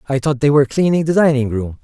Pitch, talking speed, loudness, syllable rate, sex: 140 Hz, 260 wpm, -15 LUFS, 6.7 syllables/s, male